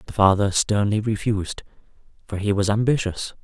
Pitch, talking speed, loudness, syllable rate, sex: 105 Hz, 155 wpm, -21 LUFS, 5.5 syllables/s, male